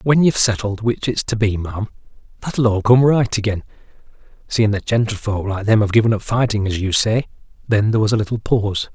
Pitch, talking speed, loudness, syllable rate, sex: 110 Hz, 200 wpm, -18 LUFS, 6.0 syllables/s, male